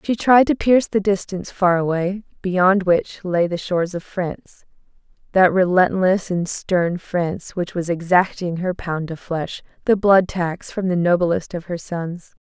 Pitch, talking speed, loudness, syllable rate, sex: 180 Hz, 175 wpm, -19 LUFS, 4.3 syllables/s, female